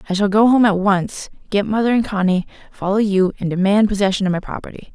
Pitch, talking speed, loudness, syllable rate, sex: 200 Hz, 220 wpm, -17 LUFS, 6.2 syllables/s, female